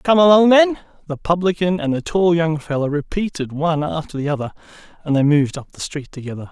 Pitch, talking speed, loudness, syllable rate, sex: 160 Hz, 200 wpm, -18 LUFS, 6.0 syllables/s, male